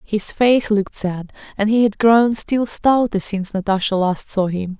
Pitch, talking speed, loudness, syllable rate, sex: 210 Hz, 190 wpm, -18 LUFS, 4.5 syllables/s, female